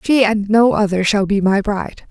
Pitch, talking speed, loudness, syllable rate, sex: 210 Hz, 230 wpm, -15 LUFS, 5.0 syllables/s, female